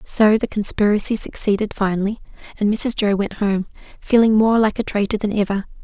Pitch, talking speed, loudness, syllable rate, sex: 210 Hz, 175 wpm, -18 LUFS, 5.5 syllables/s, female